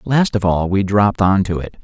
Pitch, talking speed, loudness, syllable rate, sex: 100 Hz, 260 wpm, -16 LUFS, 5.3 syllables/s, male